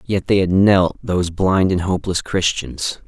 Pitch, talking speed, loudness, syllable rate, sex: 90 Hz, 175 wpm, -18 LUFS, 4.5 syllables/s, male